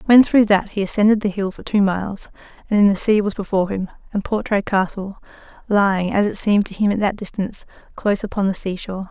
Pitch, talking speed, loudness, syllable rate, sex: 200 Hz, 225 wpm, -19 LUFS, 6.3 syllables/s, female